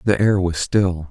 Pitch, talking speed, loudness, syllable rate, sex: 95 Hz, 215 wpm, -18 LUFS, 4.1 syllables/s, male